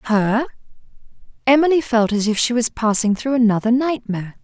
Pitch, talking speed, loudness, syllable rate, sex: 230 Hz, 150 wpm, -18 LUFS, 5.4 syllables/s, female